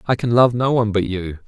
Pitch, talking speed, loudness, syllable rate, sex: 110 Hz, 285 wpm, -18 LUFS, 6.2 syllables/s, male